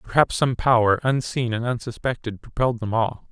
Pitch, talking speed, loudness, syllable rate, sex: 120 Hz, 165 wpm, -22 LUFS, 5.4 syllables/s, male